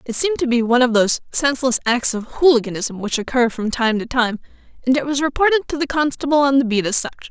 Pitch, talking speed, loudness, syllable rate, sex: 255 Hz, 240 wpm, -18 LUFS, 6.6 syllables/s, female